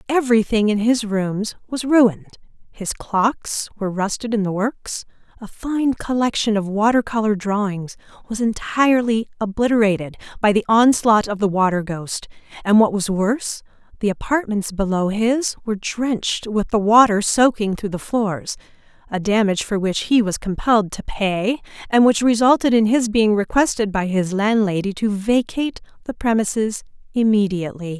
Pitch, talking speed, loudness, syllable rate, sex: 215 Hz, 150 wpm, -19 LUFS, 4.9 syllables/s, female